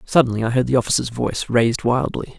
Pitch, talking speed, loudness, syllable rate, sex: 120 Hz, 200 wpm, -19 LUFS, 6.6 syllables/s, male